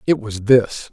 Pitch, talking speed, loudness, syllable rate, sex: 120 Hz, 195 wpm, -17 LUFS, 4.1 syllables/s, male